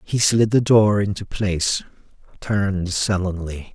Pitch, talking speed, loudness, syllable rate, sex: 100 Hz, 130 wpm, -20 LUFS, 4.2 syllables/s, male